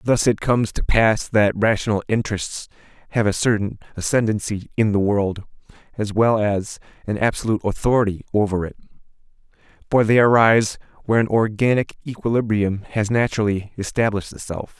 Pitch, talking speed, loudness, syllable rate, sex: 110 Hz, 140 wpm, -20 LUFS, 5.7 syllables/s, male